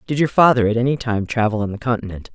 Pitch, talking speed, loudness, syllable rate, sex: 115 Hz, 255 wpm, -18 LUFS, 6.8 syllables/s, female